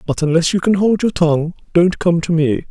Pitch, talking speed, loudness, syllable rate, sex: 170 Hz, 245 wpm, -16 LUFS, 5.6 syllables/s, male